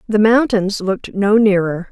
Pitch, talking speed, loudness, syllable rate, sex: 205 Hz, 155 wpm, -15 LUFS, 4.6 syllables/s, female